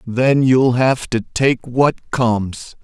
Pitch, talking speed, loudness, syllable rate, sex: 125 Hz, 150 wpm, -16 LUFS, 3.0 syllables/s, male